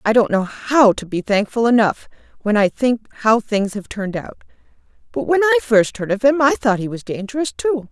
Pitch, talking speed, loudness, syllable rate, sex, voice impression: 230 Hz, 210 wpm, -18 LUFS, 5.2 syllables/s, female, very feminine, middle-aged, slightly thin, tensed, slightly powerful, slightly dark, slightly soft, clear, fluent, slightly raspy, slightly cool, intellectual, refreshing, slightly sincere, calm, slightly friendly, reassuring, slightly unique, slightly elegant, slightly wild, slightly sweet, lively, slightly strict, slightly intense, sharp, slightly light